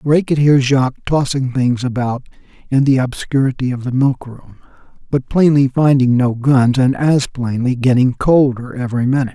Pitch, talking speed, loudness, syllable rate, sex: 130 Hz, 165 wpm, -15 LUFS, 5.0 syllables/s, male